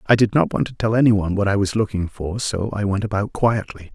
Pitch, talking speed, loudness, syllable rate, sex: 105 Hz, 275 wpm, -20 LUFS, 6.1 syllables/s, male